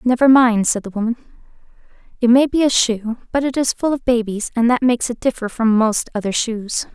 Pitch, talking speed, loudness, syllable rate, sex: 235 Hz, 215 wpm, -17 LUFS, 5.6 syllables/s, female